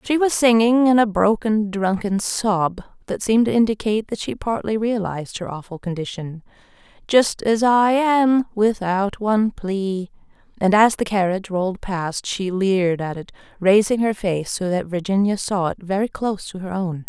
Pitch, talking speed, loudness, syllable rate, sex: 205 Hz, 170 wpm, -20 LUFS, 4.8 syllables/s, female